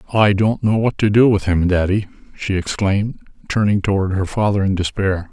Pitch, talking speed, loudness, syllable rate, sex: 100 Hz, 190 wpm, -17 LUFS, 5.4 syllables/s, male